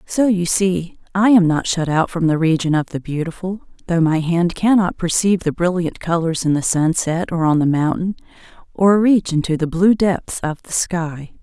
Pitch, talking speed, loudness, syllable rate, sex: 175 Hz, 200 wpm, -18 LUFS, 4.8 syllables/s, female